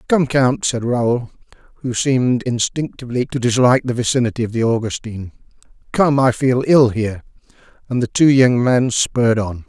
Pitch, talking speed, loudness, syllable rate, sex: 125 Hz, 160 wpm, -17 LUFS, 5.4 syllables/s, male